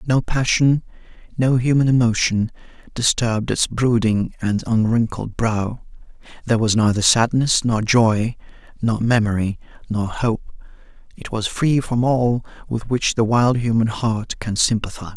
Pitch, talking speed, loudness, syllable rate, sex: 115 Hz, 130 wpm, -19 LUFS, 4.4 syllables/s, male